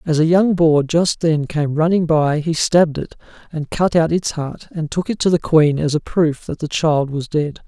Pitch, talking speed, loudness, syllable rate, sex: 160 Hz, 240 wpm, -17 LUFS, 4.6 syllables/s, male